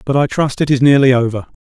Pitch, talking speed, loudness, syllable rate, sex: 135 Hz, 260 wpm, -13 LUFS, 6.4 syllables/s, male